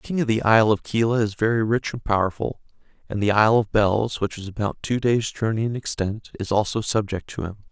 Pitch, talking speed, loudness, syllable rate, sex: 110 Hz, 235 wpm, -22 LUFS, 5.9 syllables/s, male